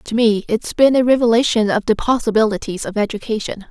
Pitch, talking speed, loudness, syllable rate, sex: 220 Hz, 180 wpm, -17 LUFS, 5.8 syllables/s, female